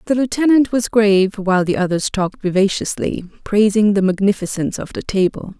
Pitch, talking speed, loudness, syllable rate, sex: 205 Hz, 160 wpm, -17 LUFS, 5.8 syllables/s, female